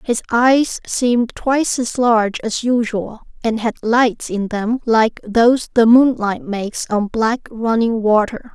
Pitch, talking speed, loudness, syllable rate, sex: 230 Hz, 155 wpm, -17 LUFS, 4.0 syllables/s, female